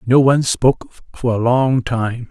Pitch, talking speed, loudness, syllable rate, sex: 125 Hz, 180 wpm, -16 LUFS, 4.6 syllables/s, male